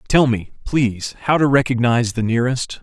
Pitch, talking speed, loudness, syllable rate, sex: 125 Hz, 170 wpm, -18 LUFS, 5.8 syllables/s, male